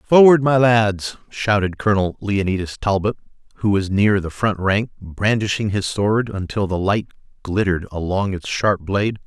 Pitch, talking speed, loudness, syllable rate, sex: 100 Hz, 155 wpm, -19 LUFS, 4.7 syllables/s, male